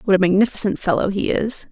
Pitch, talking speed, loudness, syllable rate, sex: 195 Hz, 210 wpm, -18 LUFS, 6.3 syllables/s, female